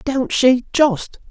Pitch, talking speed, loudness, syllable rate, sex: 255 Hz, 140 wpm, -16 LUFS, 2.8 syllables/s, male